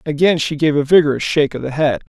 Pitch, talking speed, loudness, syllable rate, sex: 150 Hz, 250 wpm, -16 LUFS, 6.8 syllables/s, male